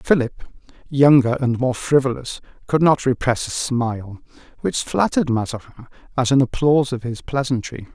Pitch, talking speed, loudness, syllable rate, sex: 130 Hz, 145 wpm, -19 LUFS, 5.4 syllables/s, male